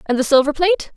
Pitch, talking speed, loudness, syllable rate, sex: 305 Hz, 250 wpm, -16 LUFS, 7.2 syllables/s, female